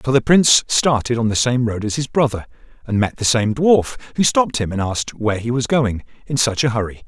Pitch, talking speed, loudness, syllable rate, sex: 120 Hz, 245 wpm, -18 LUFS, 5.9 syllables/s, male